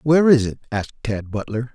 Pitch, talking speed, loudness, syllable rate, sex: 120 Hz, 205 wpm, -20 LUFS, 6.2 syllables/s, male